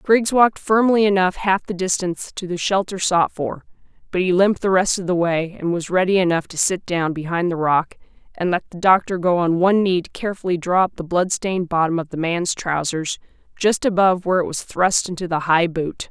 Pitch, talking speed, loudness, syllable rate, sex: 180 Hz, 220 wpm, -19 LUFS, 5.5 syllables/s, female